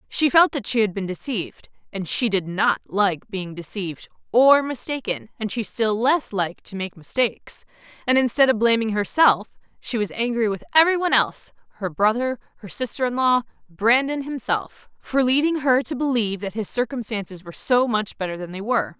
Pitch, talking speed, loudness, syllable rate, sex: 225 Hz, 175 wpm, -22 LUFS, 5.3 syllables/s, female